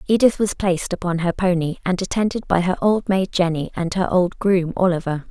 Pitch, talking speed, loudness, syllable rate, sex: 180 Hz, 205 wpm, -20 LUFS, 5.5 syllables/s, female